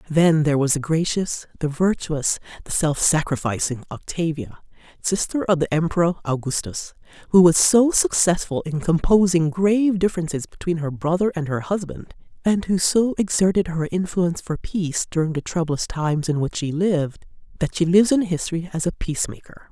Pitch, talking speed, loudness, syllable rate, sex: 170 Hz, 165 wpm, -21 LUFS, 5.3 syllables/s, female